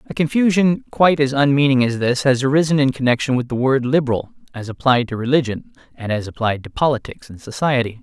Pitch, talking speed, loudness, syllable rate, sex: 135 Hz, 195 wpm, -18 LUFS, 6.1 syllables/s, male